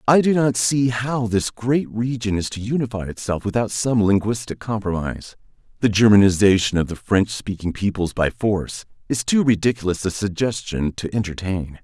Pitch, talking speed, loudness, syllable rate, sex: 110 Hz, 150 wpm, -20 LUFS, 5.1 syllables/s, male